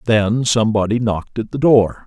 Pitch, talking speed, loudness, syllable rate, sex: 110 Hz, 175 wpm, -16 LUFS, 5.2 syllables/s, male